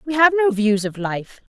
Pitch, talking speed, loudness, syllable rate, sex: 245 Hz, 230 wpm, -19 LUFS, 4.7 syllables/s, female